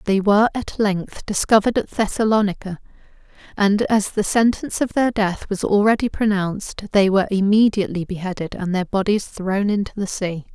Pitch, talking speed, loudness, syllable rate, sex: 200 Hz, 160 wpm, -19 LUFS, 5.4 syllables/s, female